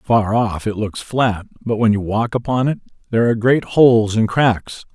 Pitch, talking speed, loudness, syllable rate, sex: 110 Hz, 205 wpm, -17 LUFS, 4.8 syllables/s, male